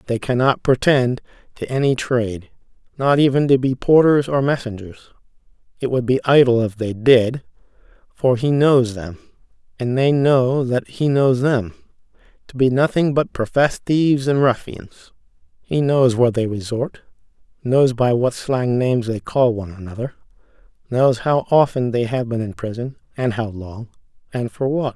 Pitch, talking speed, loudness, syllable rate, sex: 125 Hz, 160 wpm, -18 LUFS, 4.6 syllables/s, male